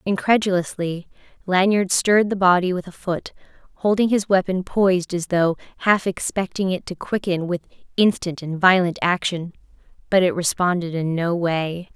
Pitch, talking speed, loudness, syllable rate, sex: 180 Hz, 150 wpm, -20 LUFS, 4.9 syllables/s, female